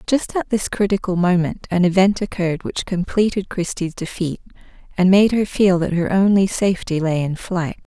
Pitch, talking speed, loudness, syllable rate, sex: 185 Hz, 175 wpm, -19 LUFS, 5.1 syllables/s, female